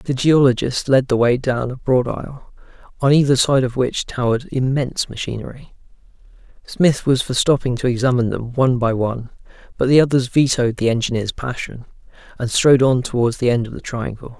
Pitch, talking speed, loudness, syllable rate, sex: 125 Hz, 180 wpm, -18 LUFS, 5.7 syllables/s, male